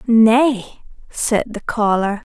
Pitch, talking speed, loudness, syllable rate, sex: 225 Hz, 105 wpm, -16 LUFS, 2.7 syllables/s, female